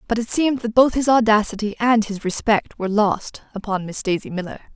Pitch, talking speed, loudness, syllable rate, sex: 215 Hz, 200 wpm, -20 LUFS, 5.8 syllables/s, female